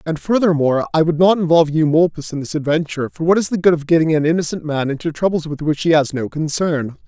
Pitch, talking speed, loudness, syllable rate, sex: 160 Hz, 235 wpm, -17 LUFS, 6.5 syllables/s, male